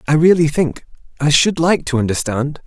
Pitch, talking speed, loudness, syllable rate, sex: 150 Hz, 180 wpm, -16 LUFS, 5.1 syllables/s, male